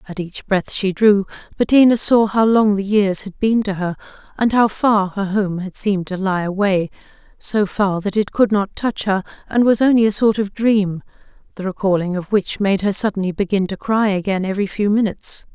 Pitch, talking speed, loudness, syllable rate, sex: 200 Hz, 210 wpm, -18 LUFS, 5.2 syllables/s, female